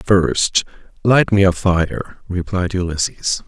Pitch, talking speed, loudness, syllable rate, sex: 95 Hz, 120 wpm, -17 LUFS, 3.5 syllables/s, male